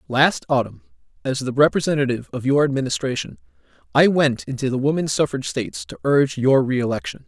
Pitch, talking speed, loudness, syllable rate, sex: 140 Hz, 155 wpm, -20 LUFS, 6.2 syllables/s, male